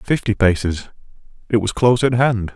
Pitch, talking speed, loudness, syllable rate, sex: 110 Hz, 140 wpm, -17 LUFS, 5.2 syllables/s, male